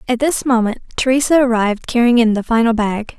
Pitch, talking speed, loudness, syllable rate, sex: 235 Hz, 190 wpm, -15 LUFS, 5.9 syllables/s, female